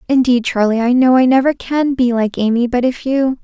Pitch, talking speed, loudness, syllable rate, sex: 250 Hz, 225 wpm, -14 LUFS, 5.3 syllables/s, female